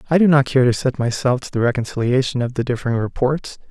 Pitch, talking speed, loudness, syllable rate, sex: 130 Hz, 225 wpm, -19 LUFS, 6.5 syllables/s, male